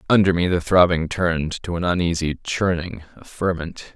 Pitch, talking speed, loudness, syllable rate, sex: 85 Hz, 165 wpm, -21 LUFS, 5.1 syllables/s, male